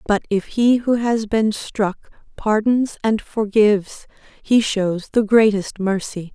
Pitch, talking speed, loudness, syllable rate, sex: 215 Hz, 140 wpm, -19 LUFS, 3.6 syllables/s, female